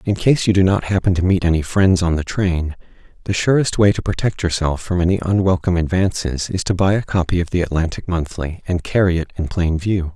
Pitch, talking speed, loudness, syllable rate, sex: 90 Hz, 225 wpm, -18 LUFS, 5.7 syllables/s, male